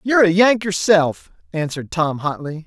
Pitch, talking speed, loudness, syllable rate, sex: 175 Hz, 160 wpm, -18 LUFS, 5.1 syllables/s, male